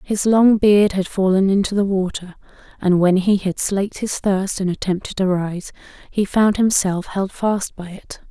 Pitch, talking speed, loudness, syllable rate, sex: 195 Hz, 190 wpm, -18 LUFS, 4.5 syllables/s, female